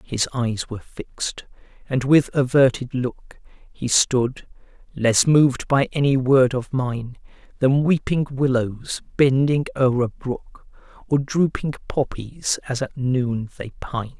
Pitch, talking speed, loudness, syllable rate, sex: 130 Hz, 135 wpm, -21 LUFS, 3.9 syllables/s, male